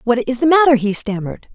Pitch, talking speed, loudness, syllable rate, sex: 250 Hz, 235 wpm, -15 LUFS, 6.3 syllables/s, female